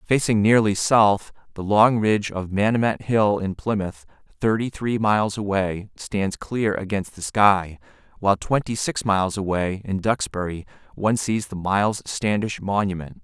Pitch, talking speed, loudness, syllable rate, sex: 100 Hz, 150 wpm, -22 LUFS, 4.6 syllables/s, male